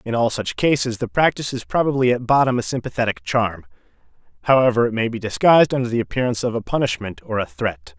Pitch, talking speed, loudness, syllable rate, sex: 115 Hz, 205 wpm, -20 LUFS, 6.5 syllables/s, male